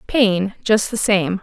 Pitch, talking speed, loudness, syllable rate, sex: 205 Hz, 170 wpm, -18 LUFS, 3.3 syllables/s, female